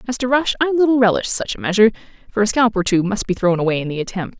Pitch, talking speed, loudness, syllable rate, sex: 215 Hz, 285 wpm, -18 LUFS, 7.1 syllables/s, female